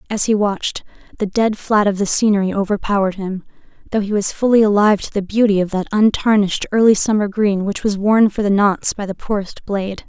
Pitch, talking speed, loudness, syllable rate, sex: 205 Hz, 210 wpm, -17 LUFS, 6.0 syllables/s, female